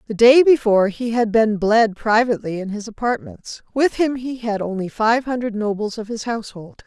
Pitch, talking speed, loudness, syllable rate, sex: 220 Hz, 190 wpm, -19 LUFS, 5.2 syllables/s, female